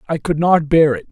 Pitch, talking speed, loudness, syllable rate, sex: 155 Hz, 270 wpm, -15 LUFS, 5.5 syllables/s, male